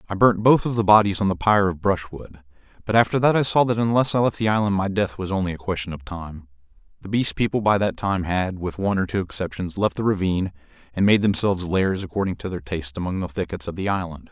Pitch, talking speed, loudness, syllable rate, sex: 95 Hz, 245 wpm, -22 LUFS, 6.4 syllables/s, male